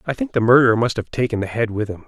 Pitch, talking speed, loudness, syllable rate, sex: 120 Hz, 320 wpm, -18 LUFS, 7.3 syllables/s, male